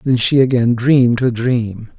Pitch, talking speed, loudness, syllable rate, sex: 120 Hz, 180 wpm, -14 LUFS, 4.4 syllables/s, male